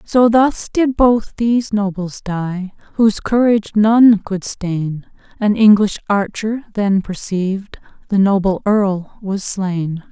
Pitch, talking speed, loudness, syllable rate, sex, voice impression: 205 Hz, 130 wpm, -16 LUFS, 3.9 syllables/s, female, very feminine, very adult-like, very middle-aged, very thin, slightly relaxed, slightly weak, slightly dark, very soft, clear, slightly fluent, very cute, very intellectual, refreshing, very sincere, very calm, very friendly, very reassuring, unique, very elegant, very sweet, slightly lively, very kind, slightly sharp, very modest, light